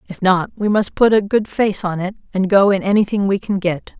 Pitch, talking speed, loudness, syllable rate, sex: 195 Hz, 255 wpm, -17 LUFS, 5.3 syllables/s, female